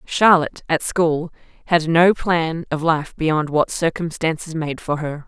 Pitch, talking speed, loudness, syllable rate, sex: 160 Hz, 160 wpm, -19 LUFS, 4.1 syllables/s, female